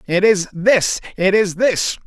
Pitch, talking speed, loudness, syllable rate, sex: 190 Hz, 175 wpm, -16 LUFS, 3.5 syllables/s, male